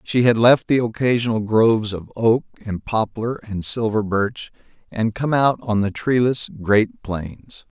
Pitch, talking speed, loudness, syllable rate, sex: 110 Hz, 160 wpm, -20 LUFS, 4.0 syllables/s, male